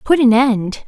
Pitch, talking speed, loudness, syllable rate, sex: 245 Hz, 205 wpm, -14 LUFS, 3.9 syllables/s, female